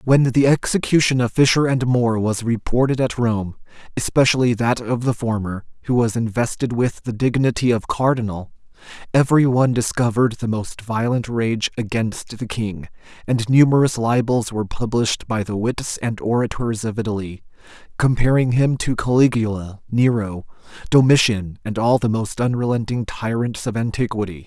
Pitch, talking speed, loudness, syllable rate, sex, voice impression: 115 Hz, 145 wpm, -19 LUFS, 5.1 syllables/s, male, masculine, adult-like, powerful, slightly bright, raspy, slightly cool, intellectual, sincere, calm, slightly wild, lively, slightly sharp, light